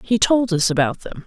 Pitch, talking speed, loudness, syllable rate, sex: 190 Hz, 235 wpm, -18 LUFS, 5.1 syllables/s, female